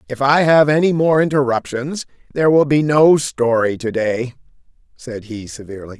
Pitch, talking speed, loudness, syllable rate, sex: 135 Hz, 160 wpm, -15 LUFS, 5.1 syllables/s, male